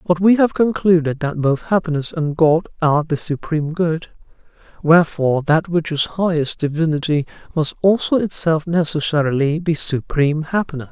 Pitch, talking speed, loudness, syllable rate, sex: 160 Hz, 145 wpm, -18 LUFS, 5.2 syllables/s, male